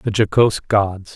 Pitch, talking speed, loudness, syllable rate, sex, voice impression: 105 Hz, 155 wpm, -17 LUFS, 4.8 syllables/s, male, masculine, adult-like, cool, slightly intellectual, calm